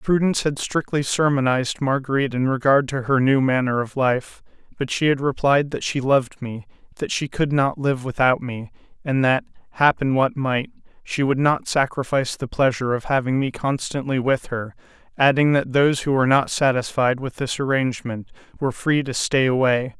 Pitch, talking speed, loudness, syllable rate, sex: 135 Hz, 180 wpm, -21 LUFS, 5.3 syllables/s, male